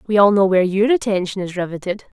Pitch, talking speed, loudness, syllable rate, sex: 195 Hz, 220 wpm, -18 LUFS, 6.4 syllables/s, female